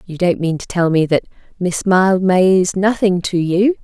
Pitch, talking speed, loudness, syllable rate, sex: 185 Hz, 205 wpm, -15 LUFS, 4.5 syllables/s, female